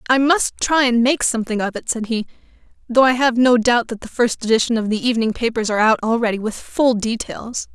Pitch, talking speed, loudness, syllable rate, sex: 235 Hz, 225 wpm, -18 LUFS, 5.9 syllables/s, female